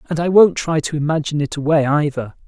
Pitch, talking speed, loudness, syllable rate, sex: 150 Hz, 220 wpm, -17 LUFS, 6.1 syllables/s, male